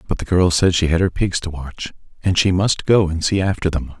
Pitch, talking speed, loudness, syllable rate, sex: 90 Hz, 270 wpm, -18 LUFS, 5.4 syllables/s, male